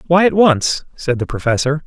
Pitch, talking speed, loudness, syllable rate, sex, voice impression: 150 Hz, 195 wpm, -16 LUFS, 5.0 syllables/s, male, masculine, adult-like, slightly clear, slightly fluent, sincere, friendly, slightly kind